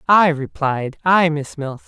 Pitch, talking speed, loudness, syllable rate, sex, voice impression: 155 Hz, 160 wpm, -18 LUFS, 3.7 syllables/s, male, masculine, very adult-like, middle-aged, slightly thick, slightly relaxed, slightly weak, slightly dark, slightly soft, slightly muffled, fluent, slightly cool, intellectual, refreshing, sincere, very calm, slightly friendly, reassuring, very unique, elegant, sweet, slightly lively, kind, very modest